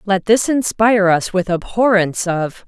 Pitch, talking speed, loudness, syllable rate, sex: 200 Hz, 155 wpm, -16 LUFS, 4.7 syllables/s, female